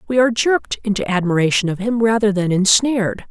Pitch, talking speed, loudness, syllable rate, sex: 210 Hz, 180 wpm, -17 LUFS, 6.1 syllables/s, female